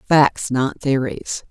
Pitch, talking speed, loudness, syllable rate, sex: 135 Hz, 120 wpm, -19 LUFS, 3.1 syllables/s, female